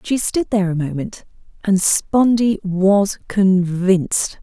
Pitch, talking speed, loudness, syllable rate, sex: 195 Hz, 120 wpm, -17 LUFS, 3.7 syllables/s, female